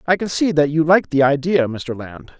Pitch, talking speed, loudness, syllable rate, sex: 150 Hz, 250 wpm, -17 LUFS, 5.0 syllables/s, male